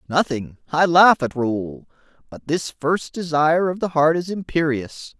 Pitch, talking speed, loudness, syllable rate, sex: 155 Hz, 150 wpm, -20 LUFS, 4.3 syllables/s, male